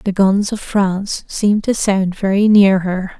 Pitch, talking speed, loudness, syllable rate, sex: 195 Hz, 190 wpm, -15 LUFS, 4.2 syllables/s, female